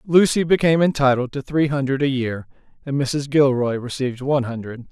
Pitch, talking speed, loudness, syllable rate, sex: 135 Hz, 170 wpm, -20 LUFS, 5.7 syllables/s, male